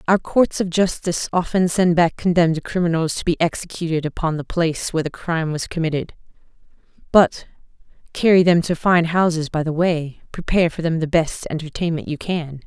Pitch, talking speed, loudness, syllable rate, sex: 165 Hz, 175 wpm, -19 LUFS, 5.6 syllables/s, female